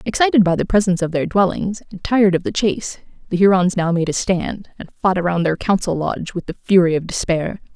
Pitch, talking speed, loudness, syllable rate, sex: 185 Hz, 225 wpm, -18 LUFS, 6.0 syllables/s, female